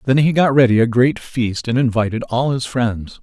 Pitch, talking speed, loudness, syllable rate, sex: 125 Hz, 225 wpm, -17 LUFS, 4.9 syllables/s, male